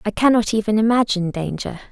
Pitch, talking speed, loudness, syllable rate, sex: 210 Hz, 155 wpm, -19 LUFS, 6.4 syllables/s, female